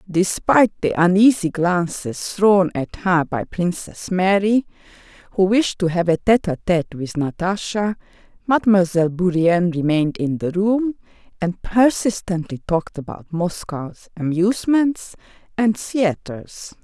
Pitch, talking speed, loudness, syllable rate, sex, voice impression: 185 Hz, 115 wpm, -19 LUFS, 4.4 syllables/s, female, very feminine, very adult-like, slightly old, slightly thin, slightly relaxed, slightly weak, slightly bright, soft, very clear, slightly fluent, slightly raspy, slightly cool, intellectual, slightly refreshing, very sincere, calm, friendly, reassuring, slightly unique, elegant, slightly sweet, slightly lively, very kind, modest, slightly light